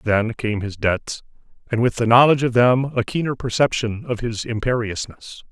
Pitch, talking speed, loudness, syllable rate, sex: 115 Hz, 175 wpm, -20 LUFS, 4.9 syllables/s, male